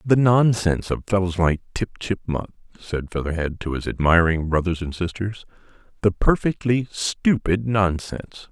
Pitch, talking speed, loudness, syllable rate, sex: 95 Hz, 125 wpm, -22 LUFS, 4.7 syllables/s, male